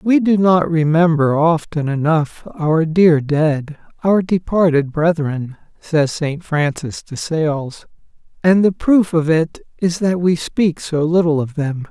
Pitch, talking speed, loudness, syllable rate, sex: 160 Hz, 150 wpm, -16 LUFS, 3.6 syllables/s, male